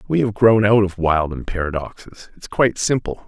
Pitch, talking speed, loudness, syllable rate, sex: 100 Hz, 200 wpm, -18 LUFS, 5.5 syllables/s, male